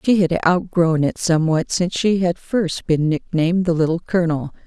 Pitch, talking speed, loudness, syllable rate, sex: 170 Hz, 180 wpm, -19 LUFS, 5.3 syllables/s, female